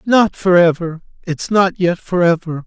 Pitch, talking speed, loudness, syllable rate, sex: 175 Hz, 180 wpm, -15 LUFS, 4.3 syllables/s, male